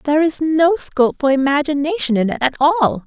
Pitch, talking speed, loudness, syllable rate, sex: 295 Hz, 195 wpm, -16 LUFS, 5.7 syllables/s, female